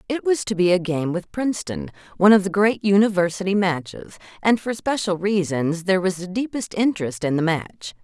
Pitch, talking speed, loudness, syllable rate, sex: 185 Hz, 195 wpm, -21 LUFS, 5.5 syllables/s, female